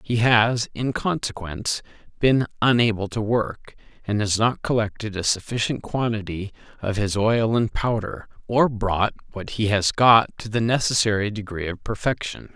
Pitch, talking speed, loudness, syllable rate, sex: 110 Hz, 155 wpm, -22 LUFS, 4.6 syllables/s, male